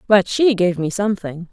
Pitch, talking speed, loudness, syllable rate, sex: 190 Hz, 195 wpm, -18 LUFS, 5.2 syllables/s, female